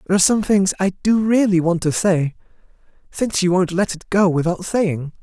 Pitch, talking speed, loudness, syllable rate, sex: 185 Hz, 205 wpm, -18 LUFS, 5.5 syllables/s, male